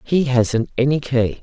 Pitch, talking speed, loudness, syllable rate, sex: 130 Hz, 170 wpm, -18 LUFS, 4.0 syllables/s, female